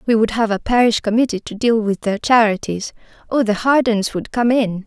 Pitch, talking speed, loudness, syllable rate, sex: 225 Hz, 195 wpm, -17 LUFS, 5.3 syllables/s, female